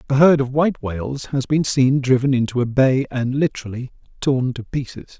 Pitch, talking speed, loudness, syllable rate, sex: 130 Hz, 195 wpm, -19 LUFS, 5.4 syllables/s, male